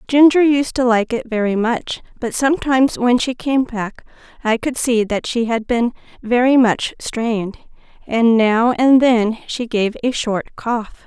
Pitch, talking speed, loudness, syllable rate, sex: 240 Hz, 175 wpm, -17 LUFS, 4.2 syllables/s, female